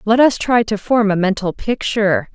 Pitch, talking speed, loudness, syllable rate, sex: 210 Hz, 205 wpm, -16 LUFS, 4.9 syllables/s, female